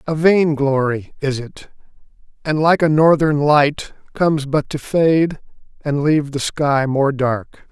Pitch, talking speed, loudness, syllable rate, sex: 145 Hz, 150 wpm, -17 LUFS, 3.9 syllables/s, male